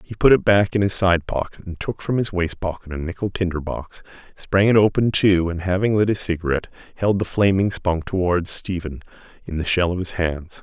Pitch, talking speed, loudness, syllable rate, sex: 90 Hz, 205 wpm, -21 LUFS, 5.6 syllables/s, male